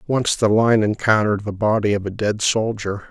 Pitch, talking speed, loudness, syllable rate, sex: 105 Hz, 195 wpm, -19 LUFS, 5.2 syllables/s, male